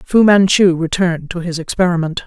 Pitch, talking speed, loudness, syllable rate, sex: 175 Hz, 160 wpm, -14 LUFS, 5.6 syllables/s, female